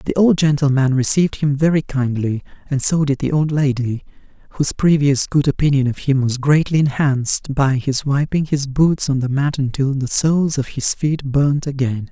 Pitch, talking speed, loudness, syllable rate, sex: 140 Hz, 190 wpm, -17 LUFS, 5.0 syllables/s, male